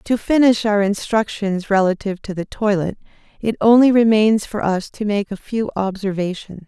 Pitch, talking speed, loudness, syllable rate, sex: 205 Hz, 160 wpm, -18 LUFS, 4.9 syllables/s, female